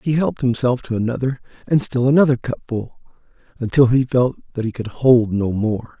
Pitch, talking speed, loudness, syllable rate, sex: 125 Hz, 180 wpm, -19 LUFS, 5.4 syllables/s, male